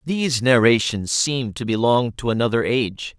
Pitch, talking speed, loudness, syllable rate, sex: 120 Hz, 150 wpm, -19 LUFS, 5.2 syllables/s, male